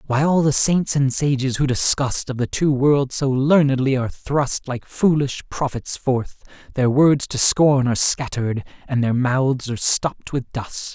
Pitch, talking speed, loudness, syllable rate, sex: 135 Hz, 180 wpm, -19 LUFS, 4.2 syllables/s, male